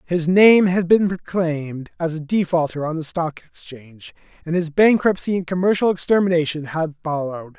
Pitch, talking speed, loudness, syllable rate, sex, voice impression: 170 Hz, 160 wpm, -19 LUFS, 5.2 syllables/s, male, masculine, slightly young, relaxed, bright, soft, muffled, slightly halting, raspy, slightly refreshing, friendly, reassuring, unique, kind, modest